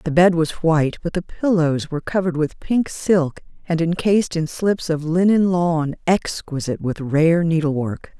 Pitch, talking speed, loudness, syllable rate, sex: 165 Hz, 170 wpm, -20 LUFS, 4.7 syllables/s, female